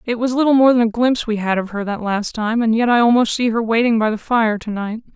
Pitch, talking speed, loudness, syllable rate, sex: 225 Hz, 305 wpm, -17 LUFS, 6.1 syllables/s, female